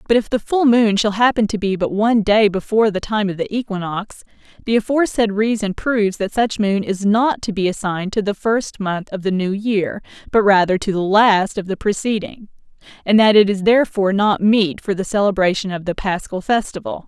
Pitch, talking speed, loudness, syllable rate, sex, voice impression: 205 Hz, 210 wpm, -17 LUFS, 5.5 syllables/s, female, very feminine, very adult-like, thin, tensed, powerful, very bright, hard, very clear, fluent, slightly cute, cool, very intellectual, very refreshing, very sincere, slightly calm, friendly, reassuring, very unique, very elegant, wild, sweet, lively, strict, slightly intense, slightly sharp, slightly light